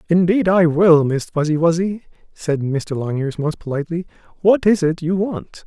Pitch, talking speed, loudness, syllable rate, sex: 170 Hz, 170 wpm, -18 LUFS, 4.8 syllables/s, male